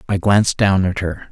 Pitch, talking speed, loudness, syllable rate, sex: 95 Hz, 230 wpm, -16 LUFS, 5.3 syllables/s, male